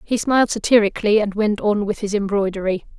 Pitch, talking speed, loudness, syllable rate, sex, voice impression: 205 Hz, 180 wpm, -19 LUFS, 6.1 syllables/s, female, feminine, slightly young, tensed, powerful, bright, slightly soft, clear, intellectual, calm, friendly, slightly reassuring, lively, kind